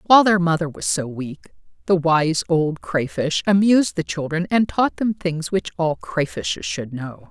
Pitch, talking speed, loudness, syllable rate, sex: 150 Hz, 180 wpm, -20 LUFS, 4.5 syllables/s, female